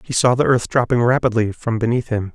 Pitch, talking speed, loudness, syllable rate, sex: 120 Hz, 230 wpm, -18 LUFS, 5.8 syllables/s, male